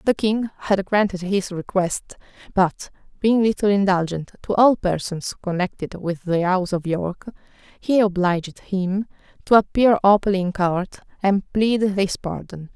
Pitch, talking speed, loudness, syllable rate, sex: 195 Hz, 145 wpm, -21 LUFS, 4.3 syllables/s, female